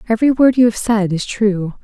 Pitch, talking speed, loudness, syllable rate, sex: 220 Hz, 230 wpm, -15 LUFS, 5.7 syllables/s, female